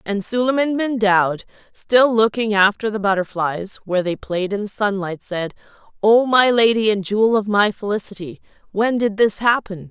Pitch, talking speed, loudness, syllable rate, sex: 210 Hz, 170 wpm, -18 LUFS, 4.8 syllables/s, female